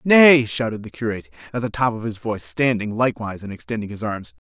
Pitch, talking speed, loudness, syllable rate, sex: 110 Hz, 215 wpm, -21 LUFS, 6.5 syllables/s, male